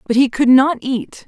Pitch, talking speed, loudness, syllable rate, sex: 255 Hz, 235 wpm, -15 LUFS, 4.6 syllables/s, female